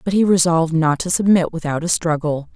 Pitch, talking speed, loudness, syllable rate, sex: 170 Hz, 210 wpm, -17 LUFS, 5.8 syllables/s, female